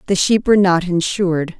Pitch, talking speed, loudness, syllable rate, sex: 185 Hz, 190 wpm, -15 LUFS, 5.8 syllables/s, female